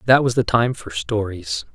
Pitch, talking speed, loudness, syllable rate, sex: 105 Hz, 205 wpm, -20 LUFS, 4.6 syllables/s, male